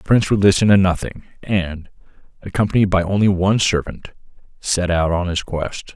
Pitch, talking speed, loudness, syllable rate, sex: 95 Hz, 170 wpm, -18 LUFS, 5.4 syllables/s, male